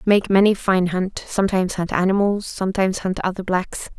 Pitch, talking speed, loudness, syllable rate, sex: 190 Hz, 165 wpm, -20 LUFS, 5.5 syllables/s, female